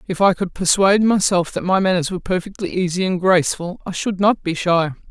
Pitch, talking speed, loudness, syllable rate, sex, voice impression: 185 Hz, 210 wpm, -18 LUFS, 5.9 syllables/s, female, very feminine, adult-like, slightly middle-aged, thin, tensed, powerful, slightly bright, hard, clear, slightly halting, cute, slightly cool, intellectual, very refreshing, sincere, calm, friendly, reassuring, slightly unique, very elegant, slightly wild, slightly sweet, slightly lively, kind, slightly modest